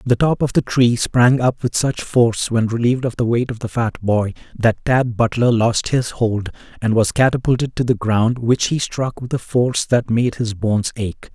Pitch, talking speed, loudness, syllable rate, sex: 120 Hz, 220 wpm, -18 LUFS, 4.8 syllables/s, male